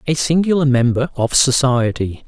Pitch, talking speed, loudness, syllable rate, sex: 135 Hz, 130 wpm, -16 LUFS, 4.8 syllables/s, male